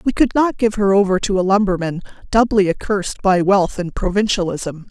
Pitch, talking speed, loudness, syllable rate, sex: 195 Hz, 185 wpm, -17 LUFS, 5.4 syllables/s, female